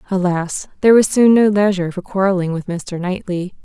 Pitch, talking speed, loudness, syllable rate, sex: 190 Hz, 180 wpm, -16 LUFS, 5.6 syllables/s, female